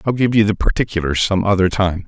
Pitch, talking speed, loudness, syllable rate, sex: 100 Hz, 230 wpm, -17 LUFS, 6.2 syllables/s, male